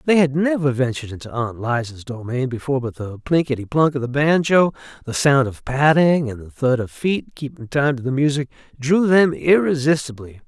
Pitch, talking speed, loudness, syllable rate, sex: 135 Hz, 190 wpm, -19 LUFS, 5.3 syllables/s, male